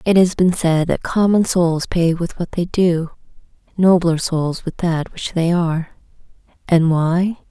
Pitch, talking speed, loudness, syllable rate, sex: 170 Hz, 170 wpm, -17 LUFS, 4.1 syllables/s, female